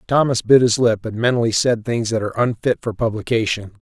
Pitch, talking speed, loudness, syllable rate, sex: 115 Hz, 205 wpm, -18 LUFS, 6.0 syllables/s, male